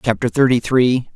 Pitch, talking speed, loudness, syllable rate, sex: 115 Hz, 155 wpm, -16 LUFS, 4.8 syllables/s, male